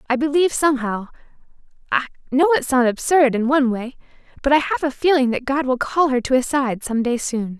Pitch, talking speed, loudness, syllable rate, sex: 265 Hz, 205 wpm, -19 LUFS, 6.0 syllables/s, female